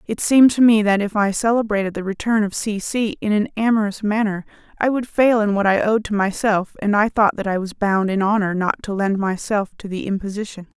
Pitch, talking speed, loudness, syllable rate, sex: 210 Hz, 235 wpm, -19 LUFS, 5.6 syllables/s, female